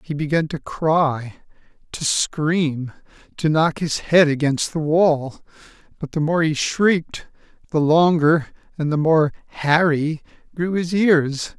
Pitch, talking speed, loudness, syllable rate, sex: 155 Hz, 140 wpm, -19 LUFS, 3.7 syllables/s, male